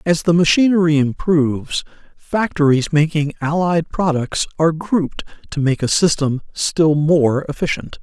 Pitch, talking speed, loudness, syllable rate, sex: 160 Hz, 125 wpm, -17 LUFS, 4.6 syllables/s, male